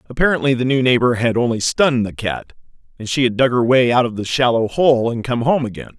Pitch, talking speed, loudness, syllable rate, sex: 125 Hz, 240 wpm, -17 LUFS, 6.1 syllables/s, male